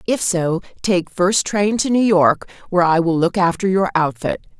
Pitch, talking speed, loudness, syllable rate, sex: 185 Hz, 195 wpm, -17 LUFS, 4.7 syllables/s, female